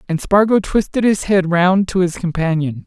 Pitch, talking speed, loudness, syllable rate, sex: 185 Hz, 190 wpm, -16 LUFS, 4.8 syllables/s, male